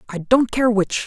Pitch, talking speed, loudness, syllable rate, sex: 225 Hz, 225 wpm, -18 LUFS, 4.5 syllables/s, female